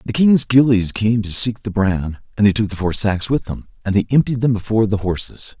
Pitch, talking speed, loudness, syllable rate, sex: 110 Hz, 245 wpm, -17 LUFS, 5.5 syllables/s, male